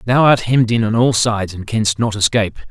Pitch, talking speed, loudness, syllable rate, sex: 110 Hz, 245 wpm, -15 LUFS, 6.0 syllables/s, male